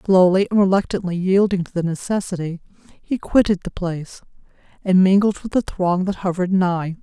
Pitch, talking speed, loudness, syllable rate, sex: 185 Hz, 160 wpm, -19 LUFS, 5.4 syllables/s, female